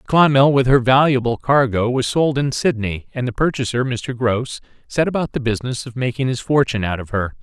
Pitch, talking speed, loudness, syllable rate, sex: 125 Hz, 210 wpm, -18 LUFS, 5.7 syllables/s, male